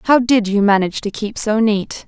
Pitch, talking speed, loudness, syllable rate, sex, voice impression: 215 Hz, 230 wpm, -16 LUFS, 4.9 syllables/s, female, slightly feminine, slightly adult-like, sincere, slightly calm